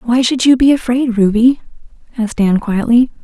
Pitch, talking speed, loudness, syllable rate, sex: 240 Hz, 165 wpm, -13 LUFS, 5.7 syllables/s, female